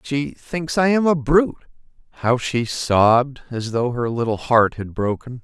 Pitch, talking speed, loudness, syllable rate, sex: 130 Hz, 165 wpm, -20 LUFS, 4.3 syllables/s, male